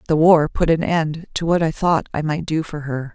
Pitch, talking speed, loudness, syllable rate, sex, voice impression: 160 Hz, 265 wpm, -19 LUFS, 4.9 syllables/s, female, feminine, adult-like, clear, intellectual, elegant